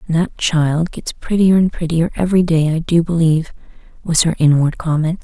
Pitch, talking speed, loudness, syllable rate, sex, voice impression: 165 Hz, 170 wpm, -16 LUFS, 5.2 syllables/s, female, very feminine, very middle-aged, very thin, very relaxed, slightly weak, slightly dark, very soft, very muffled, fluent, raspy, slightly cute, very intellectual, refreshing, slightly sincere, calm, friendly, slightly reassuring, very unique, very elegant, slightly wild, very sweet, lively, very kind, very modest, light